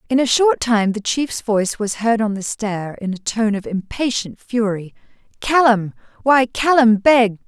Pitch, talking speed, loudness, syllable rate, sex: 225 Hz, 175 wpm, -18 LUFS, 4.3 syllables/s, female